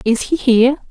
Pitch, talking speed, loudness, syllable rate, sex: 250 Hz, 200 wpm, -14 LUFS, 5.1 syllables/s, female